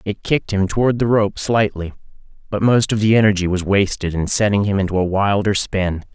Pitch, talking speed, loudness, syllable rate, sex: 100 Hz, 205 wpm, -17 LUFS, 5.5 syllables/s, male